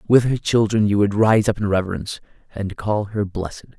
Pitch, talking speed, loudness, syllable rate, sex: 105 Hz, 205 wpm, -20 LUFS, 5.7 syllables/s, male